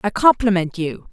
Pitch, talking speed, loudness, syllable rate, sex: 195 Hz, 160 wpm, -18 LUFS, 5.0 syllables/s, female